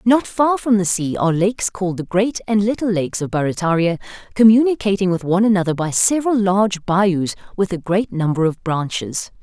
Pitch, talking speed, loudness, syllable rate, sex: 195 Hz, 185 wpm, -18 LUFS, 5.7 syllables/s, female